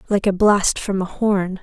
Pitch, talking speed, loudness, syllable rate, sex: 195 Hz, 220 wpm, -18 LUFS, 4.2 syllables/s, female